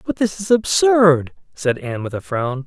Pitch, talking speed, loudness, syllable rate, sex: 160 Hz, 205 wpm, -18 LUFS, 4.2 syllables/s, male